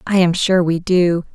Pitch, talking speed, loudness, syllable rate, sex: 175 Hz, 225 wpm, -16 LUFS, 4.3 syllables/s, female